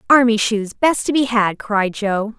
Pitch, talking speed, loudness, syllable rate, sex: 220 Hz, 200 wpm, -17 LUFS, 4.1 syllables/s, female